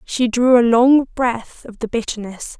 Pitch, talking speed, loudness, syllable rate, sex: 235 Hz, 185 wpm, -16 LUFS, 4.2 syllables/s, female